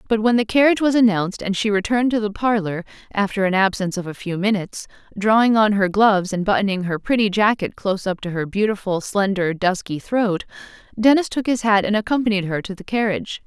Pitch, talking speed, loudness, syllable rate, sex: 205 Hz, 205 wpm, -19 LUFS, 6.2 syllables/s, female